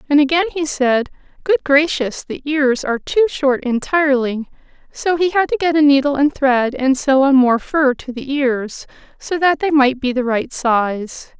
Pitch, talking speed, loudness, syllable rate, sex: 275 Hz, 195 wpm, -16 LUFS, 4.5 syllables/s, female